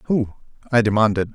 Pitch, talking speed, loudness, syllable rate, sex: 110 Hz, 135 wpm, -20 LUFS, 5.4 syllables/s, male